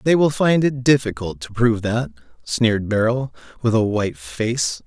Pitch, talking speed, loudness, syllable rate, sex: 115 Hz, 175 wpm, -20 LUFS, 4.9 syllables/s, male